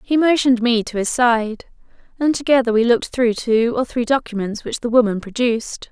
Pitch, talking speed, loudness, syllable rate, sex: 240 Hz, 195 wpm, -18 LUFS, 5.4 syllables/s, female